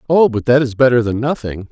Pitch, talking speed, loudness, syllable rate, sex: 125 Hz, 245 wpm, -15 LUFS, 5.9 syllables/s, male